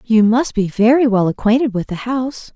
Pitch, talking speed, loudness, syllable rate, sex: 230 Hz, 210 wpm, -16 LUFS, 5.3 syllables/s, female